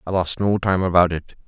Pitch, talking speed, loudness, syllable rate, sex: 90 Hz, 245 wpm, -19 LUFS, 5.5 syllables/s, male